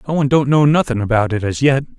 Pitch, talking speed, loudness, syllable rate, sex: 130 Hz, 270 wpm, -15 LUFS, 7.0 syllables/s, male